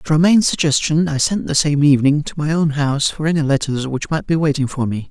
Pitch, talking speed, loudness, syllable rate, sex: 150 Hz, 245 wpm, -17 LUFS, 6.2 syllables/s, male